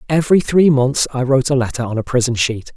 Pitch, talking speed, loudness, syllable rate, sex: 135 Hz, 240 wpm, -16 LUFS, 6.4 syllables/s, male